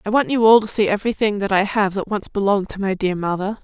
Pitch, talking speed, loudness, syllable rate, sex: 205 Hz, 280 wpm, -19 LUFS, 6.5 syllables/s, female